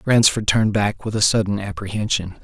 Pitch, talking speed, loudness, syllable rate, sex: 105 Hz, 175 wpm, -19 LUFS, 5.6 syllables/s, male